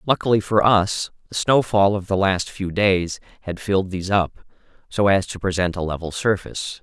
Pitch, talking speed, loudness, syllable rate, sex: 95 Hz, 185 wpm, -21 LUFS, 5.1 syllables/s, male